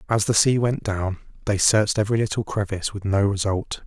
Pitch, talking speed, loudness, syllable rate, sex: 105 Hz, 200 wpm, -22 LUFS, 5.9 syllables/s, male